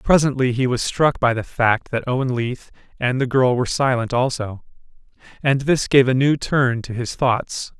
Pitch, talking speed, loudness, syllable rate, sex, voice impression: 125 Hz, 195 wpm, -19 LUFS, 4.7 syllables/s, male, masculine, adult-like, slightly clear, slightly fluent, sincere, friendly, slightly kind